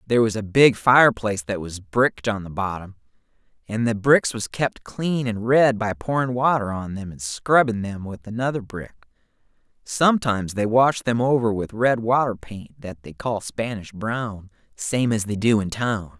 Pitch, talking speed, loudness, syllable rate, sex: 110 Hz, 185 wpm, -22 LUFS, 4.7 syllables/s, male